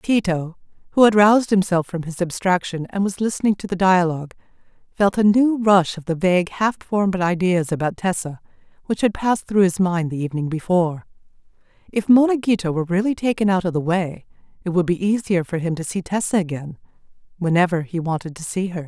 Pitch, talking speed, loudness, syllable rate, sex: 185 Hz, 190 wpm, -20 LUFS, 5.8 syllables/s, female